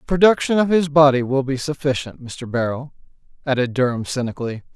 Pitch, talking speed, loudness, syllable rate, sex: 140 Hz, 165 wpm, -19 LUFS, 6.0 syllables/s, male